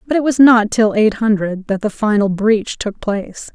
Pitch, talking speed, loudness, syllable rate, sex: 215 Hz, 220 wpm, -15 LUFS, 4.7 syllables/s, female